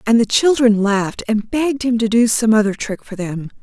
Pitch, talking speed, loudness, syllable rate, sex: 225 Hz, 230 wpm, -16 LUFS, 5.3 syllables/s, female